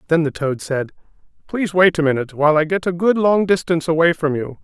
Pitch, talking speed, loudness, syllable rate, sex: 165 Hz, 235 wpm, -17 LUFS, 6.5 syllables/s, male